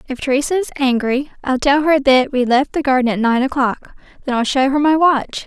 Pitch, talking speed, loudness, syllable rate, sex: 270 Hz, 230 wpm, -16 LUFS, 5.5 syllables/s, female